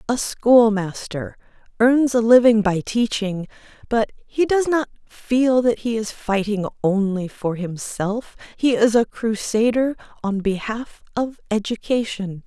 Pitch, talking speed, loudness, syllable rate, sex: 225 Hz, 130 wpm, -20 LUFS, 3.8 syllables/s, female